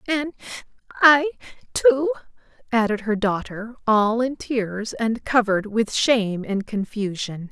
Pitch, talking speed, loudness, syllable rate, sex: 235 Hz, 120 wpm, -21 LUFS, 4.2 syllables/s, female